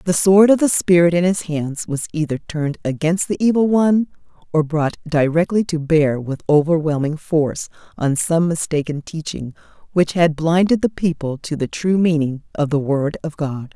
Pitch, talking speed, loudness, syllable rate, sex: 160 Hz, 180 wpm, -18 LUFS, 4.9 syllables/s, female